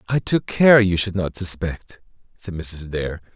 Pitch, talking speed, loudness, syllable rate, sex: 95 Hz, 180 wpm, -20 LUFS, 4.4 syllables/s, male